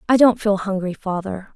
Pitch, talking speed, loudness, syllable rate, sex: 200 Hz, 195 wpm, -19 LUFS, 5.2 syllables/s, female